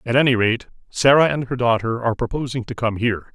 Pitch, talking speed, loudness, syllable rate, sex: 120 Hz, 215 wpm, -19 LUFS, 6.3 syllables/s, male